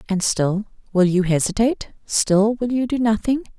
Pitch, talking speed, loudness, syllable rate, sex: 210 Hz, 165 wpm, -20 LUFS, 4.9 syllables/s, female